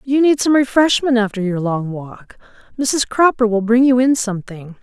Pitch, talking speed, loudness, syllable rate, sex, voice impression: 235 Hz, 185 wpm, -16 LUFS, 4.9 syllables/s, female, very feminine, adult-like, slightly middle-aged, thin, tensed, slightly powerful, bright, hard, very clear, very fluent, cool, slightly intellectual, slightly refreshing, sincere, slightly calm, slightly friendly, slightly reassuring, unique, elegant, slightly wild, slightly sweet, lively, strict, slightly intense, sharp